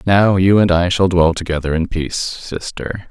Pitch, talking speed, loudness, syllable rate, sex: 90 Hz, 175 wpm, -16 LUFS, 4.7 syllables/s, male